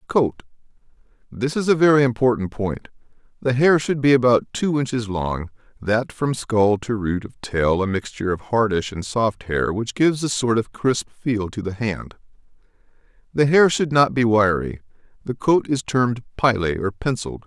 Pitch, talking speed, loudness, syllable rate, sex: 115 Hz, 175 wpm, -20 LUFS, 4.7 syllables/s, male